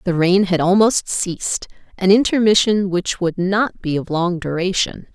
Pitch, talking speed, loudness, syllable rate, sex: 185 Hz, 165 wpm, -17 LUFS, 4.5 syllables/s, female